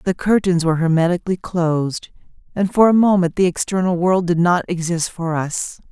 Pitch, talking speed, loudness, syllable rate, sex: 175 Hz, 175 wpm, -18 LUFS, 5.3 syllables/s, female